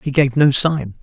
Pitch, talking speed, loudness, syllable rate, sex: 140 Hz, 235 wpm, -15 LUFS, 4.4 syllables/s, male